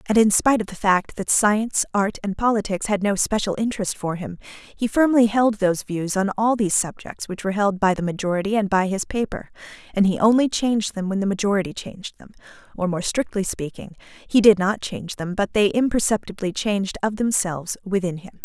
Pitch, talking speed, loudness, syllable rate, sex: 200 Hz, 200 wpm, -21 LUFS, 5.7 syllables/s, female